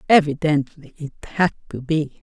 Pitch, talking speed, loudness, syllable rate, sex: 150 Hz, 130 wpm, -21 LUFS, 4.6 syllables/s, female